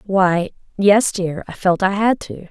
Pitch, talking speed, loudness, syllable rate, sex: 195 Hz, 145 wpm, -17 LUFS, 3.8 syllables/s, female